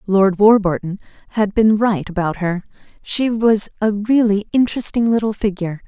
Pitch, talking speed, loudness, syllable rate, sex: 205 Hz, 145 wpm, -17 LUFS, 5.0 syllables/s, female